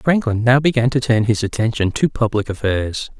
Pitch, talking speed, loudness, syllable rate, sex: 115 Hz, 190 wpm, -18 LUFS, 5.1 syllables/s, male